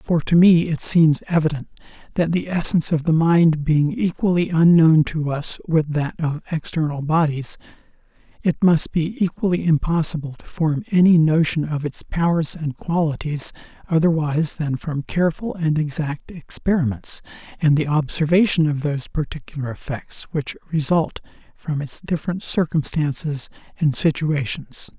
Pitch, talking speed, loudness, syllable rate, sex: 160 Hz, 140 wpm, -20 LUFS, 4.7 syllables/s, male